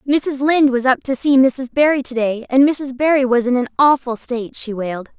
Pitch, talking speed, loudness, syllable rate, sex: 260 Hz, 220 wpm, -16 LUFS, 5.5 syllables/s, female